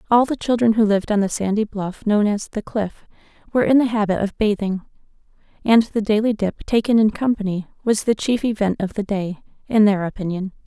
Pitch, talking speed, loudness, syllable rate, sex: 210 Hz, 205 wpm, -20 LUFS, 5.8 syllables/s, female